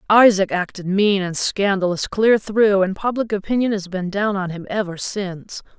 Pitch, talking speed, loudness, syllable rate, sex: 195 Hz, 175 wpm, -19 LUFS, 4.8 syllables/s, female